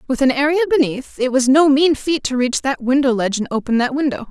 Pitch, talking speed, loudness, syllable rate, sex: 265 Hz, 250 wpm, -17 LUFS, 6.1 syllables/s, female